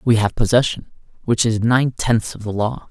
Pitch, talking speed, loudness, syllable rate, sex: 115 Hz, 205 wpm, -18 LUFS, 4.9 syllables/s, male